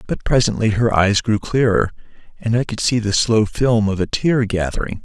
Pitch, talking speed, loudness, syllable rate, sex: 110 Hz, 200 wpm, -18 LUFS, 5.0 syllables/s, male